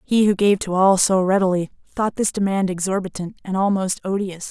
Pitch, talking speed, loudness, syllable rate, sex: 190 Hz, 185 wpm, -20 LUFS, 5.4 syllables/s, female